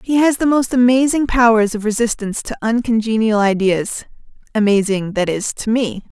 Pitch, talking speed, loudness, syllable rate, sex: 225 Hz, 155 wpm, -16 LUFS, 5.2 syllables/s, female